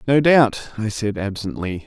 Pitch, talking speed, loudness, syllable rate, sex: 115 Hz, 160 wpm, -20 LUFS, 4.2 syllables/s, male